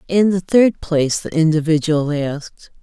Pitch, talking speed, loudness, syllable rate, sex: 165 Hz, 150 wpm, -17 LUFS, 4.7 syllables/s, female